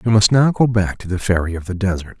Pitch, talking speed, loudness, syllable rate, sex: 100 Hz, 300 wpm, -17 LUFS, 6.2 syllables/s, male